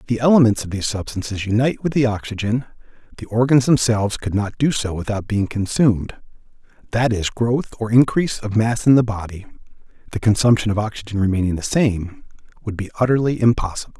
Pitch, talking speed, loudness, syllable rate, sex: 110 Hz, 165 wpm, -19 LUFS, 6.0 syllables/s, male